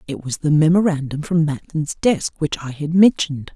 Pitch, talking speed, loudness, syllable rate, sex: 155 Hz, 185 wpm, -19 LUFS, 5.1 syllables/s, female